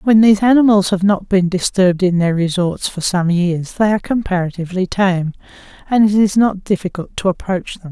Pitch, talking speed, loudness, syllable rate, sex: 190 Hz, 190 wpm, -15 LUFS, 5.5 syllables/s, female